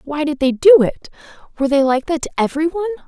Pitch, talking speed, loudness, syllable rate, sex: 280 Hz, 215 wpm, -16 LUFS, 7.2 syllables/s, female